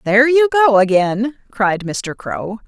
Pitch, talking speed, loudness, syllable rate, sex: 235 Hz, 155 wpm, -15 LUFS, 4.3 syllables/s, female